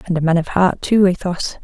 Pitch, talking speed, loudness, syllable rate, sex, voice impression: 180 Hz, 255 wpm, -16 LUFS, 5.4 syllables/s, female, feminine, slightly adult-like, soft, slightly muffled, sincere, calm